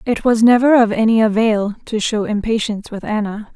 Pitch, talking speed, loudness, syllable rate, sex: 220 Hz, 185 wpm, -16 LUFS, 5.5 syllables/s, female